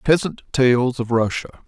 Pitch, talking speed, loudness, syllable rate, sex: 125 Hz, 145 wpm, -20 LUFS, 4.4 syllables/s, male